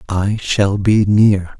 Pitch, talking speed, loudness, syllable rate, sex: 100 Hz, 150 wpm, -14 LUFS, 2.8 syllables/s, male